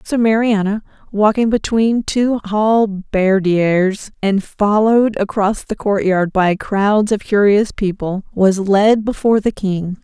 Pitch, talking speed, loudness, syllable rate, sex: 205 Hz, 125 wpm, -15 LUFS, 3.7 syllables/s, female